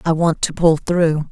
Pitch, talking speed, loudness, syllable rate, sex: 160 Hz, 230 wpm, -17 LUFS, 4.1 syllables/s, female